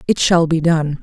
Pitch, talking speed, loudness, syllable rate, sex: 160 Hz, 235 wpm, -15 LUFS, 4.6 syllables/s, female